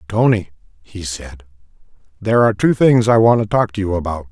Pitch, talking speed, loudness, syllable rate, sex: 100 Hz, 195 wpm, -15 LUFS, 5.8 syllables/s, male